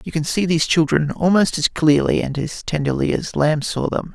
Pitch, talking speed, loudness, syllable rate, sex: 155 Hz, 215 wpm, -19 LUFS, 5.2 syllables/s, male